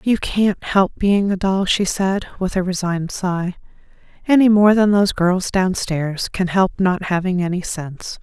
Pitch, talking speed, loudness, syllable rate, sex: 190 Hz, 175 wpm, -18 LUFS, 4.4 syllables/s, female